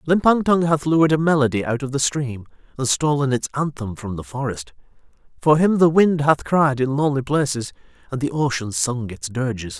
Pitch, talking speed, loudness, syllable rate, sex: 135 Hz, 195 wpm, -20 LUFS, 5.4 syllables/s, male